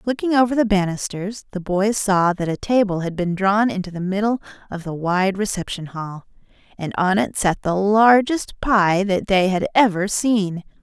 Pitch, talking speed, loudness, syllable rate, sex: 195 Hz, 185 wpm, -19 LUFS, 4.6 syllables/s, female